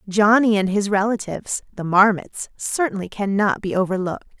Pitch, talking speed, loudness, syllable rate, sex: 200 Hz, 135 wpm, -20 LUFS, 5.4 syllables/s, female